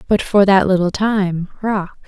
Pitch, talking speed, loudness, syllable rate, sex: 195 Hz, 175 wpm, -16 LUFS, 4.2 syllables/s, female